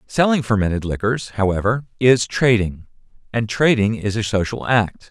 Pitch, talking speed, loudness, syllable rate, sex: 110 Hz, 140 wpm, -19 LUFS, 4.8 syllables/s, male